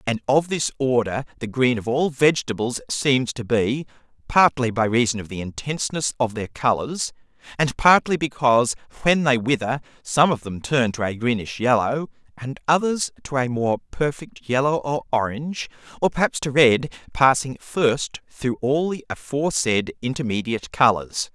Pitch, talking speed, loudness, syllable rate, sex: 130 Hz, 155 wpm, -22 LUFS, 4.8 syllables/s, male